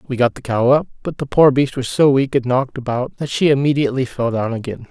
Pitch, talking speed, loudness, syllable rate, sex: 130 Hz, 255 wpm, -17 LUFS, 6.1 syllables/s, male